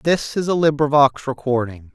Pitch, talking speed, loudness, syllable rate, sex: 140 Hz, 155 wpm, -18 LUFS, 4.7 syllables/s, male